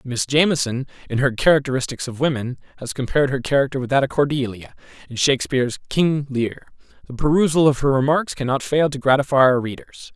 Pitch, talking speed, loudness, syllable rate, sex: 135 Hz, 175 wpm, -20 LUFS, 6.0 syllables/s, male